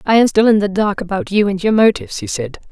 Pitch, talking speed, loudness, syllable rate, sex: 205 Hz, 290 wpm, -15 LUFS, 6.5 syllables/s, female